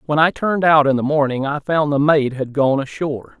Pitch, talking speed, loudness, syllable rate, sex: 145 Hz, 245 wpm, -17 LUFS, 5.6 syllables/s, male